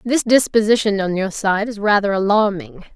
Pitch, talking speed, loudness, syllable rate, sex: 205 Hz, 165 wpm, -17 LUFS, 5.0 syllables/s, female